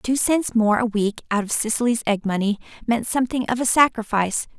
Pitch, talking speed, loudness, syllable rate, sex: 230 Hz, 195 wpm, -21 LUFS, 5.7 syllables/s, female